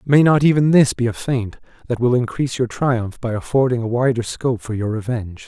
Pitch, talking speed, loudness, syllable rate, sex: 120 Hz, 220 wpm, -19 LUFS, 5.7 syllables/s, male